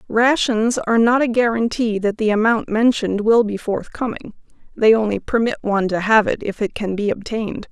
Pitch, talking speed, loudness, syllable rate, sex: 220 Hz, 185 wpm, -18 LUFS, 5.4 syllables/s, female